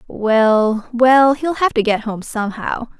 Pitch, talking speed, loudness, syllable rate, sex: 235 Hz, 160 wpm, -16 LUFS, 3.7 syllables/s, female